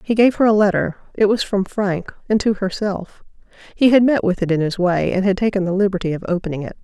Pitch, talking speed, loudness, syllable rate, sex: 195 Hz, 245 wpm, -18 LUFS, 6.0 syllables/s, female